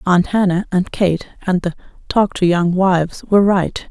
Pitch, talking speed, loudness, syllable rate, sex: 185 Hz, 185 wpm, -16 LUFS, 4.8 syllables/s, female